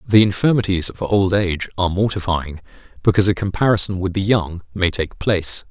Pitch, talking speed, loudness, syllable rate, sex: 95 Hz, 170 wpm, -18 LUFS, 5.8 syllables/s, male